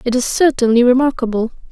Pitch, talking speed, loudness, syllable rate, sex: 250 Hz, 140 wpm, -14 LUFS, 6.3 syllables/s, female